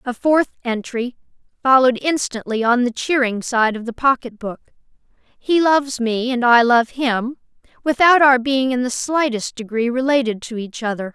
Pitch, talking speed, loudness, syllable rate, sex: 250 Hz, 160 wpm, -18 LUFS, 4.9 syllables/s, female